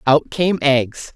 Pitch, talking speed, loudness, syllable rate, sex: 145 Hz, 155 wpm, -17 LUFS, 3.0 syllables/s, female